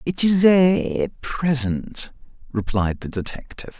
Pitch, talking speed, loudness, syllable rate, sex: 140 Hz, 110 wpm, -21 LUFS, 3.7 syllables/s, male